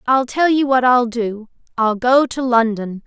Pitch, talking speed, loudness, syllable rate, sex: 245 Hz, 195 wpm, -16 LUFS, 4.2 syllables/s, female